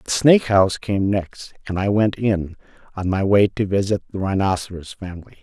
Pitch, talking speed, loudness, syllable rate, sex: 100 Hz, 190 wpm, -19 LUFS, 5.3 syllables/s, male